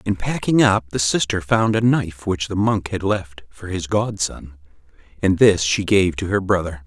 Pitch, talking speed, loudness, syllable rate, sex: 95 Hz, 200 wpm, -19 LUFS, 4.7 syllables/s, male